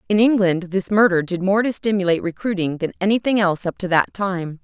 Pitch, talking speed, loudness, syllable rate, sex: 190 Hz, 205 wpm, -19 LUFS, 6.0 syllables/s, female